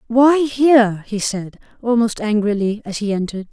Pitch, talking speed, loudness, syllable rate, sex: 225 Hz, 155 wpm, -17 LUFS, 4.9 syllables/s, female